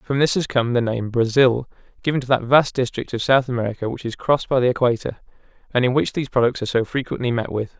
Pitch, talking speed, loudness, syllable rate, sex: 125 Hz, 240 wpm, -20 LUFS, 6.5 syllables/s, male